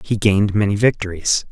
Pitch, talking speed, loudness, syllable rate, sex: 105 Hz, 160 wpm, -17 LUFS, 5.8 syllables/s, male